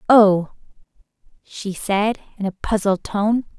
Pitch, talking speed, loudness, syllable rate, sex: 205 Hz, 115 wpm, -20 LUFS, 3.7 syllables/s, female